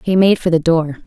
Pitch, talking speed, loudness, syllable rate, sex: 170 Hz, 280 wpm, -14 LUFS, 5.4 syllables/s, female